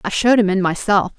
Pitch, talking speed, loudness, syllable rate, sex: 205 Hz, 255 wpm, -16 LUFS, 6.7 syllables/s, female